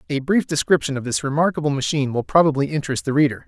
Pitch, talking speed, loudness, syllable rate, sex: 145 Hz, 205 wpm, -20 LUFS, 7.3 syllables/s, male